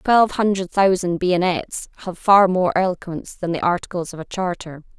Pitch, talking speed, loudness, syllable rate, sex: 180 Hz, 170 wpm, -19 LUFS, 5.3 syllables/s, female